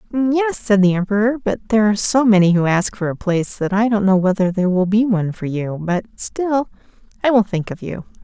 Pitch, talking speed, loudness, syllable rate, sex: 205 Hz, 235 wpm, -17 LUFS, 6.1 syllables/s, female